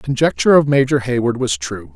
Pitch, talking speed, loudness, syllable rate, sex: 120 Hz, 215 wpm, -16 LUFS, 6.3 syllables/s, male